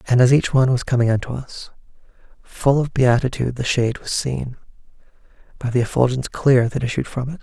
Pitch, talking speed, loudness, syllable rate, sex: 125 Hz, 185 wpm, -19 LUFS, 6.1 syllables/s, male